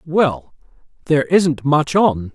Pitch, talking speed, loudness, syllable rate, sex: 155 Hz, 130 wpm, -16 LUFS, 3.6 syllables/s, male